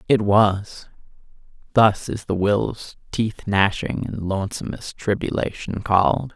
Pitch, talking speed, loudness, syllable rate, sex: 100 Hz, 115 wpm, -21 LUFS, 3.9 syllables/s, male